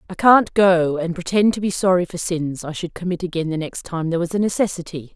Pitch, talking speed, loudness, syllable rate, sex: 175 Hz, 245 wpm, -20 LUFS, 5.8 syllables/s, female